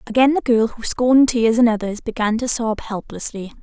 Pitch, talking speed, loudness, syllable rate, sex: 230 Hz, 200 wpm, -18 LUFS, 5.3 syllables/s, female